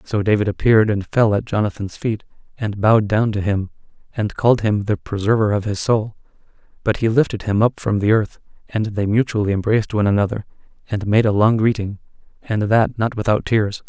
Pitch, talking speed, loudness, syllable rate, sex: 105 Hz, 195 wpm, -19 LUFS, 5.7 syllables/s, male